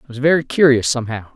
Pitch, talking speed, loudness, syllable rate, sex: 130 Hz, 220 wpm, -16 LUFS, 7.1 syllables/s, male